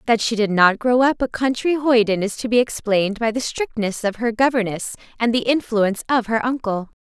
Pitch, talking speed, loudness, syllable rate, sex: 230 Hz, 215 wpm, -19 LUFS, 5.5 syllables/s, female